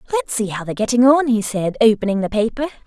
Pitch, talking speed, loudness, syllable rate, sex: 230 Hz, 230 wpm, -18 LUFS, 6.6 syllables/s, female